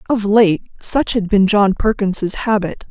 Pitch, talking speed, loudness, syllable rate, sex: 205 Hz, 165 wpm, -16 LUFS, 4.1 syllables/s, female